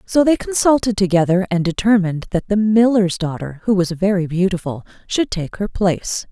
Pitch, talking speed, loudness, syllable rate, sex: 195 Hz, 170 wpm, -17 LUFS, 5.3 syllables/s, female